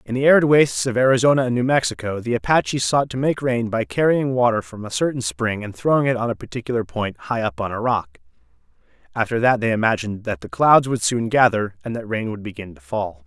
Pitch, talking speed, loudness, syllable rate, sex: 115 Hz, 230 wpm, -20 LUFS, 6.0 syllables/s, male